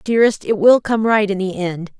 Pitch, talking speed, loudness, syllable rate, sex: 205 Hz, 240 wpm, -16 LUFS, 5.4 syllables/s, female